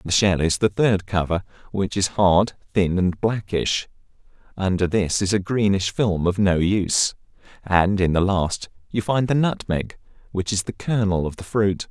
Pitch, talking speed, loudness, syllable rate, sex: 95 Hz, 180 wpm, -21 LUFS, 4.5 syllables/s, male